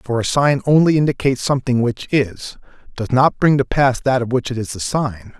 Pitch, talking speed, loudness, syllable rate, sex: 130 Hz, 220 wpm, -17 LUFS, 5.4 syllables/s, male